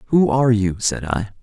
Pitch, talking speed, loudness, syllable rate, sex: 115 Hz, 210 wpm, -18 LUFS, 5.9 syllables/s, male